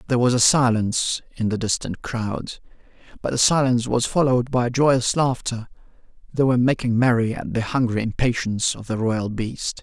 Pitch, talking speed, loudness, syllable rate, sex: 120 Hz, 165 wpm, -21 LUFS, 5.3 syllables/s, male